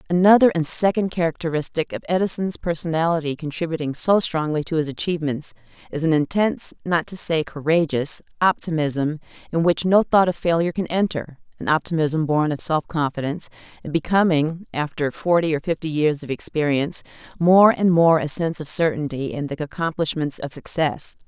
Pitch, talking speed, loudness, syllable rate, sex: 160 Hz, 155 wpm, -21 LUFS, 5.5 syllables/s, female